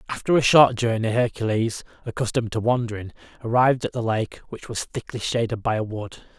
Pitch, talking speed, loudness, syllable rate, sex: 115 Hz, 180 wpm, -22 LUFS, 5.8 syllables/s, male